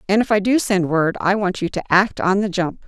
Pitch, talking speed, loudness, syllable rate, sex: 195 Hz, 290 wpm, -18 LUFS, 5.5 syllables/s, female